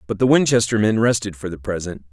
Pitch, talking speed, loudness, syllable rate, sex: 100 Hz, 225 wpm, -19 LUFS, 6.4 syllables/s, male